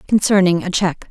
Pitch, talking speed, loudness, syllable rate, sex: 185 Hz, 165 wpm, -16 LUFS, 6.4 syllables/s, female